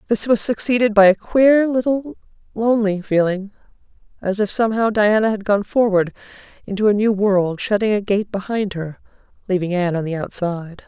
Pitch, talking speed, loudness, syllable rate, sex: 205 Hz, 165 wpm, -18 LUFS, 5.4 syllables/s, female